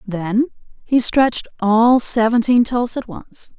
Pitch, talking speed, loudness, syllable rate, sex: 230 Hz, 135 wpm, -17 LUFS, 3.7 syllables/s, female